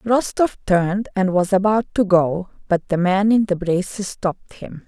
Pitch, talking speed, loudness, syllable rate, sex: 195 Hz, 185 wpm, -19 LUFS, 4.5 syllables/s, female